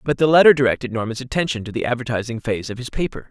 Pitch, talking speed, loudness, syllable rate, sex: 125 Hz, 235 wpm, -19 LUFS, 7.5 syllables/s, male